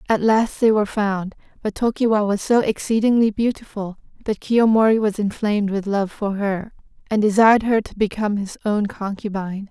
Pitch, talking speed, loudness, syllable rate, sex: 210 Hz, 165 wpm, -20 LUFS, 5.4 syllables/s, female